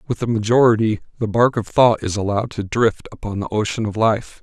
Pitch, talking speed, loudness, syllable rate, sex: 110 Hz, 215 wpm, -19 LUFS, 5.8 syllables/s, male